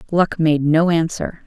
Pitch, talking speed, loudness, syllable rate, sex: 160 Hz, 165 wpm, -17 LUFS, 3.8 syllables/s, female